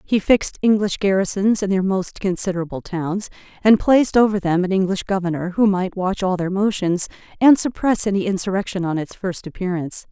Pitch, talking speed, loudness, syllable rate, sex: 190 Hz, 180 wpm, -19 LUFS, 5.6 syllables/s, female